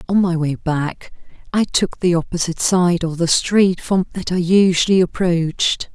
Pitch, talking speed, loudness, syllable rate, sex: 175 Hz, 170 wpm, -17 LUFS, 4.6 syllables/s, female